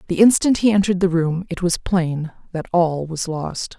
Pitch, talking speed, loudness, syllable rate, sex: 175 Hz, 205 wpm, -19 LUFS, 4.8 syllables/s, female